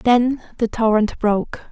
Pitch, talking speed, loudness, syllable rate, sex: 225 Hz, 140 wpm, -19 LUFS, 4.0 syllables/s, female